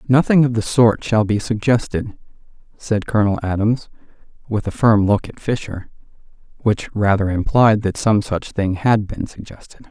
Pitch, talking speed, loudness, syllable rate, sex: 110 Hz, 155 wpm, -18 LUFS, 4.7 syllables/s, male